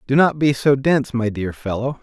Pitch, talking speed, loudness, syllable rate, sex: 130 Hz, 240 wpm, -19 LUFS, 5.3 syllables/s, male